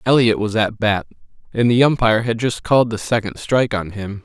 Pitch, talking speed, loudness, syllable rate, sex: 115 Hz, 210 wpm, -18 LUFS, 5.7 syllables/s, male